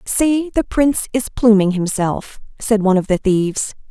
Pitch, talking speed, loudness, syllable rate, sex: 220 Hz, 170 wpm, -17 LUFS, 5.0 syllables/s, female